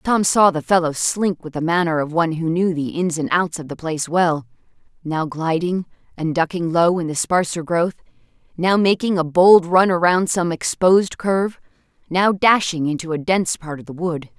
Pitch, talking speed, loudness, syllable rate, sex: 170 Hz, 190 wpm, -19 LUFS, 5.0 syllables/s, female